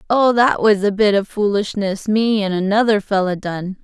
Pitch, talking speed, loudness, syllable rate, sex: 205 Hz, 190 wpm, -17 LUFS, 4.7 syllables/s, female